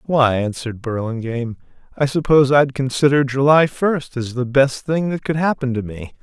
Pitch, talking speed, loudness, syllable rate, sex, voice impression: 135 Hz, 175 wpm, -18 LUFS, 5.2 syllables/s, male, masculine, adult-like, refreshing, friendly